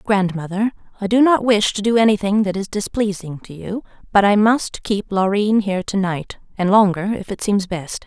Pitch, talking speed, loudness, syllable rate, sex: 200 Hz, 195 wpm, -18 LUFS, 5.0 syllables/s, female